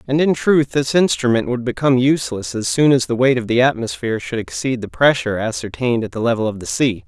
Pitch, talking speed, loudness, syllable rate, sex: 120 Hz, 230 wpm, -18 LUFS, 6.2 syllables/s, male